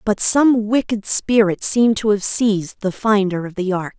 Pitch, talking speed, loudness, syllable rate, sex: 210 Hz, 195 wpm, -17 LUFS, 4.7 syllables/s, female